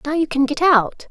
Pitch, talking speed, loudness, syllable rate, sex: 295 Hz, 270 wpm, -17 LUFS, 5.1 syllables/s, female